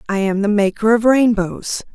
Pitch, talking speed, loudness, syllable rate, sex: 215 Hz, 185 wpm, -16 LUFS, 4.8 syllables/s, female